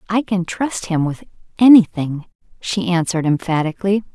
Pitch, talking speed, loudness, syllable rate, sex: 185 Hz, 130 wpm, -17 LUFS, 5.4 syllables/s, female